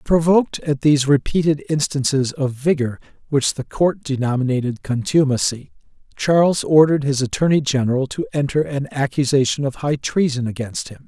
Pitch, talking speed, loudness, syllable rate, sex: 140 Hz, 140 wpm, -19 LUFS, 5.3 syllables/s, male